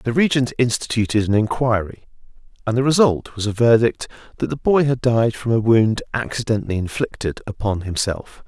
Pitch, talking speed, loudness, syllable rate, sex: 115 Hz, 165 wpm, -19 LUFS, 5.3 syllables/s, male